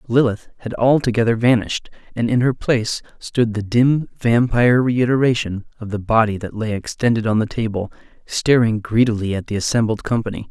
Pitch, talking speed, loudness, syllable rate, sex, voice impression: 115 Hz, 160 wpm, -18 LUFS, 5.5 syllables/s, male, masculine, middle-aged, tensed, bright, soft, fluent, sincere, calm, friendly, reassuring, kind, modest